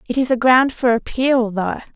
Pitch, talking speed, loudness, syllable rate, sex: 245 Hz, 215 wpm, -17 LUFS, 5.0 syllables/s, female